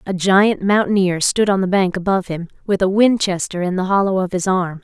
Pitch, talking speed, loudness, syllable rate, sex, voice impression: 190 Hz, 225 wpm, -17 LUFS, 5.5 syllables/s, female, very feminine, slightly young, slightly clear, slightly cute, friendly